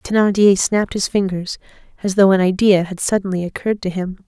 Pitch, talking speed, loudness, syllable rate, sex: 195 Hz, 185 wpm, -17 LUFS, 5.8 syllables/s, female